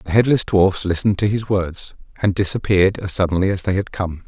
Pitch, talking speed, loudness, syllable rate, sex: 95 Hz, 210 wpm, -18 LUFS, 5.8 syllables/s, male